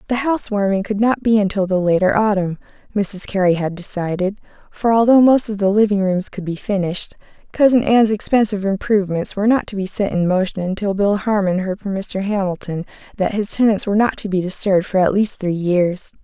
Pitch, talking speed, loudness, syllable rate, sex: 200 Hz, 200 wpm, -18 LUFS, 5.8 syllables/s, female